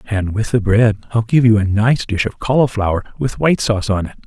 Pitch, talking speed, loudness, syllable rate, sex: 110 Hz, 240 wpm, -16 LUFS, 6.0 syllables/s, male